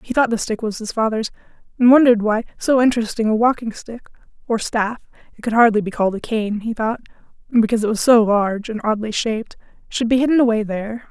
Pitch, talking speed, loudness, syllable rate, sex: 225 Hz, 200 wpm, -18 LUFS, 6.3 syllables/s, female